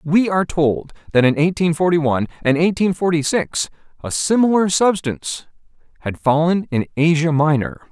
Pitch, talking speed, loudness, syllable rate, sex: 160 Hz, 150 wpm, -18 LUFS, 5.1 syllables/s, male